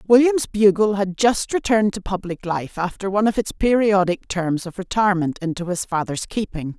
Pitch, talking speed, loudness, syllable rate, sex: 195 Hz, 175 wpm, -20 LUFS, 5.3 syllables/s, female